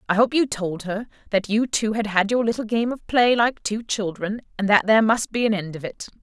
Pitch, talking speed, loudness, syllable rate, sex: 215 Hz, 260 wpm, -22 LUFS, 5.4 syllables/s, female